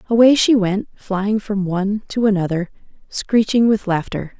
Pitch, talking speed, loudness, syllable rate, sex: 205 Hz, 150 wpm, -18 LUFS, 4.6 syllables/s, female